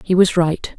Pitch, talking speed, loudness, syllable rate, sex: 175 Hz, 230 wpm, -16 LUFS, 4.4 syllables/s, female